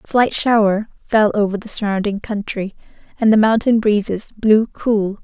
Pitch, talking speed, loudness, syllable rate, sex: 210 Hz, 160 wpm, -17 LUFS, 4.7 syllables/s, female